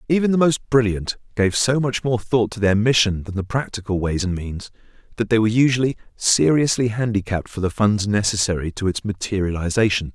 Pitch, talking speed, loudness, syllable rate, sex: 110 Hz, 185 wpm, -20 LUFS, 5.7 syllables/s, male